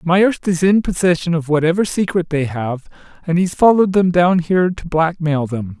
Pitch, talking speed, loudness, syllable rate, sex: 170 Hz, 185 wpm, -16 LUFS, 5.1 syllables/s, male